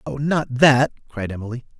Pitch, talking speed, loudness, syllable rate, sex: 130 Hz, 165 wpm, -20 LUFS, 5.2 syllables/s, male